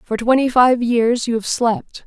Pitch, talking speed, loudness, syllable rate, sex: 240 Hz, 205 wpm, -17 LUFS, 4.1 syllables/s, female